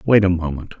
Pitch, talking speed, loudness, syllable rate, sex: 90 Hz, 225 wpm, -18 LUFS, 6.2 syllables/s, male